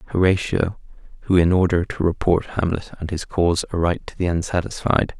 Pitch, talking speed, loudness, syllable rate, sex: 85 Hz, 160 wpm, -21 LUFS, 5.5 syllables/s, male